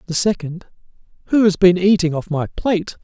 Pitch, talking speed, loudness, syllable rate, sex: 180 Hz, 180 wpm, -17 LUFS, 5.5 syllables/s, male